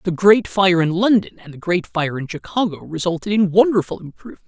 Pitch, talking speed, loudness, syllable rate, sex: 180 Hz, 200 wpm, -18 LUFS, 5.8 syllables/s, male